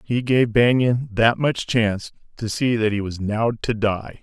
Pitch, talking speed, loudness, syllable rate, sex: 115 Hz, 200 wpm, -20 LUFS, 4.3 syllables/s, male